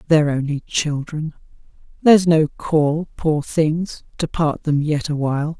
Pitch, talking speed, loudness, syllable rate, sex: 155 Hz, 140 wpm, -19 LUFS, 4.2 syllables/s, female